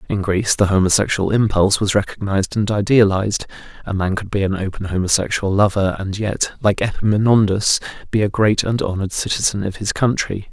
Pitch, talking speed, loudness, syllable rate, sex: 100 Hz, 170 wpm, -18 LUFS, 5.9 syllables/s, male